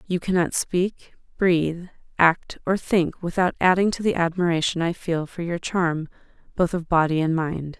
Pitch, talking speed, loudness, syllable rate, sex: 170 Hz, 170 wpm, -23 LUFS, 4.6 syllables/s, female